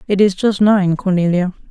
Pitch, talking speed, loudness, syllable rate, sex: 190 Hz, 175 wpm, -15 LUFS, 5.0 syllables/s, female